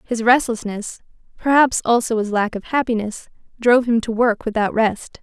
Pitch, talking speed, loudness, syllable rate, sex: 230 Hz, 160 wpm, -18 LUFS, 5.0 syllables/s, female